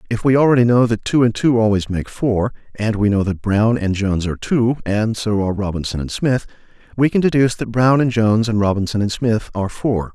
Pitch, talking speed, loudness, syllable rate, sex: 110 Hz, 230 wpm, -17 LUFS, 5.8 syllables/s, male